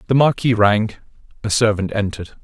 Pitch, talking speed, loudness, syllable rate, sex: 110 Hz, 150 wpm, -18 LUFS, 6.0 syllables/s, male